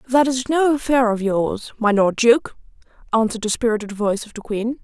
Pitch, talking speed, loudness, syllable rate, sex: 230 Hz, 200 wpm, -19 LUFS, 5.4 syllables/s, female